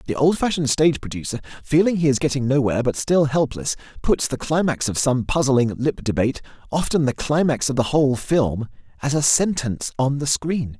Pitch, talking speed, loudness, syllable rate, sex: 140 Hz, 185 wpm, -21 LUFS, 5.6 syllables/s, male